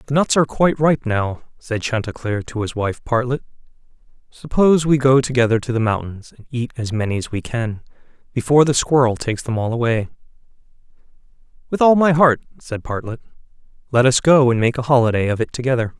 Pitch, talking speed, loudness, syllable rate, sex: 125 Hz, 185 wpm, -18 LUFS, 6.0 syllables/s, male